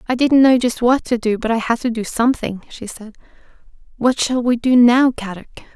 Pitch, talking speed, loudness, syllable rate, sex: 240 Hz, 220 wpm, -16 LUFS, 5.4 syllables/s, female